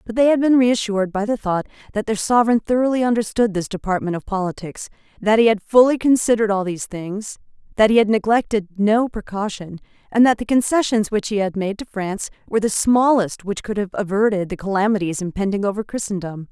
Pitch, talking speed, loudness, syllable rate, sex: 210 Hz, 195 wpm, -19 LUFS, 6.0 syllables/s, female